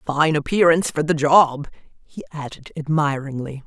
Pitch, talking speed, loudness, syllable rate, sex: 150 Hz, 130 wpm, -19 LUFS, 4.8 syllables/s, female